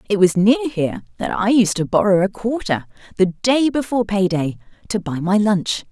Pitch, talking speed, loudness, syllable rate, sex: 200 Hz, 205 wpm, -18 LUFS, 5.3 syllables/s, female